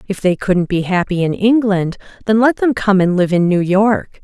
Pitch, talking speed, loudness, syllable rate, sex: 195 Hz, 225 wpm, -15 LUFS, 4.8 syllables/s, female